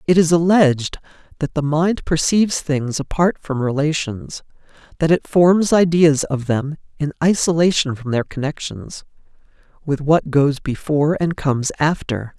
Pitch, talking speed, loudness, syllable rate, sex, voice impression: 150 Hz, 135 wpm, -18 LUFS, 4.5 syllables/s, male, masculine, adult-like, slightly muffled, slightly cool, slightly refreshing, slightly sincere, slightly kind